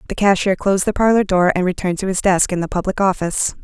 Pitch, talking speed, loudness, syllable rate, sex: 190 Hz, 250 wpm, -17 LUFS, 6.8 syllables/s, female